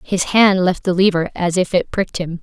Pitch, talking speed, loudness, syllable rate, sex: 185 Hz, 245 wpm, -16 LUFS, 5.3 syllables/s, female